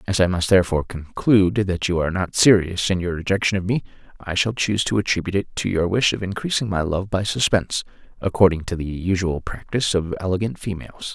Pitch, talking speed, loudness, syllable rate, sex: 95 Hz, 205 wpm, -21 LUFS, 6.2 syllables/s, male